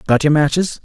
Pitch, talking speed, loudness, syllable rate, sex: 150 Hz, 215 wpm, -15 LUFS, 6.0 syllables/s, male